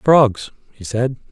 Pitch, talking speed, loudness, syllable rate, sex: 125 Hz, 135 wpm, -17 LUFS, 3.2 syllables/s, male